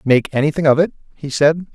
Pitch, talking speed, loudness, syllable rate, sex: 150 Hz, 205 wpm, -16 LUFS, 5.8 syllables/s, male